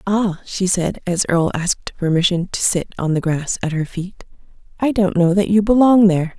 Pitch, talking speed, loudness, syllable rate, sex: 185 Hz, 205 wpm, -17 LUFS, 5.2 syllables/s, female